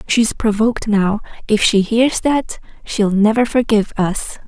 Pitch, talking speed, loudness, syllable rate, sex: 220 Hz, 145 wpm, -16 LUFS, 4.3 syllables/s, female